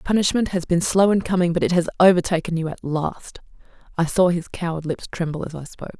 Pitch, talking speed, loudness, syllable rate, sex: 175 Hz, 220 wpm, -21 LUFS, 6.2 syllables/s, female